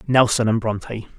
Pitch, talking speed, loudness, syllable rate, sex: 115 Hz, 150 wpm, -20 LUFS, 5.2 syllables/s, male